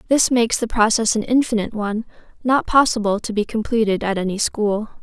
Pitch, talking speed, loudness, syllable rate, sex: 220 Hz, 180 wpm, -19 LUFS, 6.0 syllables/s, female